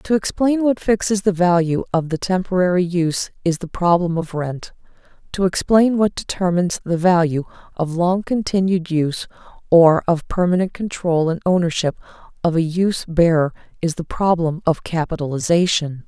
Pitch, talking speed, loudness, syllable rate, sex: 175 Hz, 150 wpm, -19 LUFS, 5.1 syllables/s, female